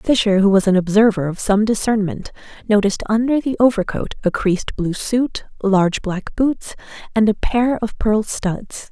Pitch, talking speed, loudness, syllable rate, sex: 210 Hz, 170 wpm, -18 LUFS, 4.8 syllables/s, female